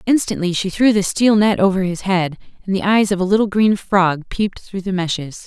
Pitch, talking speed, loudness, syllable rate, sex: 190 Hz, 230 wpm, -17 LUFS, 5.3 syllables/s, female